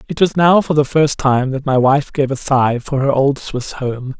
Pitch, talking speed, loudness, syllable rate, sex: 135 Hz, 260 wpm, -15 LUFS, 4.5 syllables/s, male